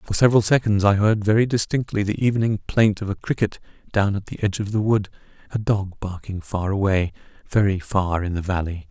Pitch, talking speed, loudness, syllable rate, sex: 100 Hz, 200 wpm, -22 LUFS, 5.8 syllables/s, male